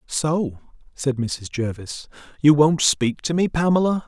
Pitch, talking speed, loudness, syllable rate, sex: 145 Hz, 145 wpm, -20 LUFS, 4.0 syllables/s, male